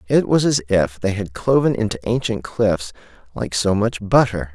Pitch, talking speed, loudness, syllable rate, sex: 105 Hz, 185 wpm, -19 LUFS, 4.7 syllables/s, male